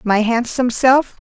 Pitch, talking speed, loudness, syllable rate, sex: 240 Hz, 140 wpm, -16 LUFS, 4.6 syllables/s, female